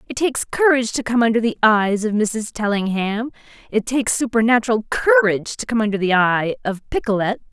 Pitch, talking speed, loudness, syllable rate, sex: 225 Hz, 175 wpm, -19 LUFS, 5.7 syllables/s, female